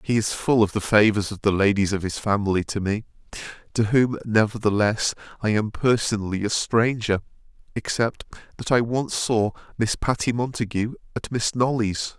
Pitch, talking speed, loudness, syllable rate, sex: 110 Hz, 160 wpm, -23 LUFS, 5.0 syllables/s, male